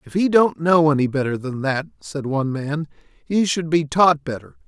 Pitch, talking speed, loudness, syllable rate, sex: 150 Hz, 205 wpm, -20 LUFS, 4.8 syllables/s, male